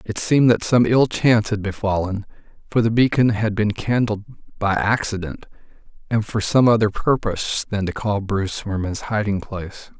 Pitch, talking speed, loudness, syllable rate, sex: 105 Hz, 175 wpm, -20 LUFS, 5.2 syllables/s, male